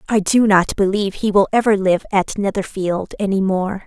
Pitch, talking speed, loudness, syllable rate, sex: 200 Hz, 185 wpm, -17 LUFS, 5.0 syllables/s, female